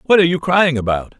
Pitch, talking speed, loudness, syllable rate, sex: 155 Hz, 250 wpm, -15 LUFS, 6.5 syllables/s, male